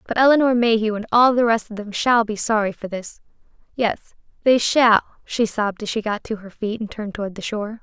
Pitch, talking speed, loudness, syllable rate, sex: 220 Hz, 230 wpm, -20 LUFS, 5.8 syllables/s, female